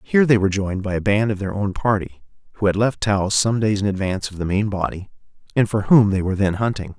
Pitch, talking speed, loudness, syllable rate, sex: 100 Hz, 260 wpm, -20 LUFS, 6.4 syllables/s, male